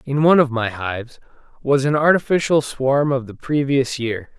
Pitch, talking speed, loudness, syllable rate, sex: 135 Hz, 180 wpm, -18 LUFS, 5.0 syllables/s, male